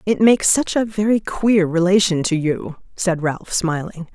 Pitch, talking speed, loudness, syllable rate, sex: 185 Hz, 175 wpm, -18 LUFS, 4.4 syllables/s, female